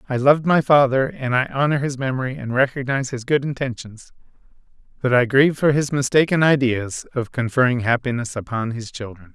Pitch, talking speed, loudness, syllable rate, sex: 130 Hz, 175 wpm, -19 LUFS, 5.8 syllables/s, male